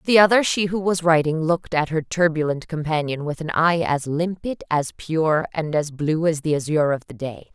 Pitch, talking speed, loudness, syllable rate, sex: 160 Hz, 215 wpm, -21 LUFS, 5.1 syllables/s, female